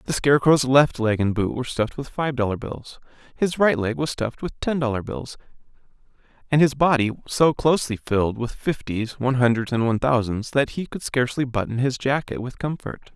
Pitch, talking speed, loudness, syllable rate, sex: 130 Hz, 195 wpm, -22 LUFS, 5.6 syllables/s, male